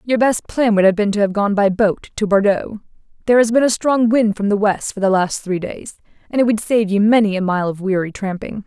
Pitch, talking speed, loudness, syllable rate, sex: 210 Hz, 265 wpm, -17 LUFS, 5.6 syllables/s, female